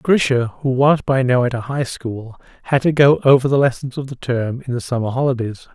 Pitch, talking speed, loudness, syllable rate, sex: 130 Hz, 230 wpm, -18 LUFS, 5.3 syllables/s, male